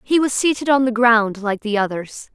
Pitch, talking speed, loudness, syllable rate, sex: 235 Hz, 230 wpm, -17 LUFS, 4.9 syllables/s, female